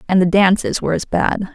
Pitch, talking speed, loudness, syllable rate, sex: 195 Hz, 235 wpm, -16 LUFS, 5.8 syllables/s, female